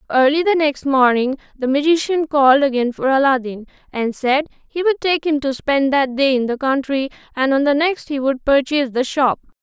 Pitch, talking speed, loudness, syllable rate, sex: 280 Hz, 200 wpm, -17 LUFS, 5.3 syllables/s, female